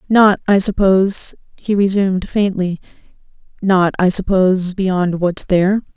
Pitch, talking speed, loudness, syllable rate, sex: 190 Hz, 110 wpm, -15 LUFS, 4.7 syllables/s, female